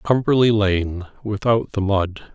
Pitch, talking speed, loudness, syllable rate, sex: 105 Hz, 130 wpm, -20 LUFS, 4.1 syllables/s, male